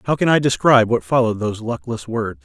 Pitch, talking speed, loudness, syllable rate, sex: 120 Hz, 220 wpm, -18 LUFS, 6.6 syllables/s, male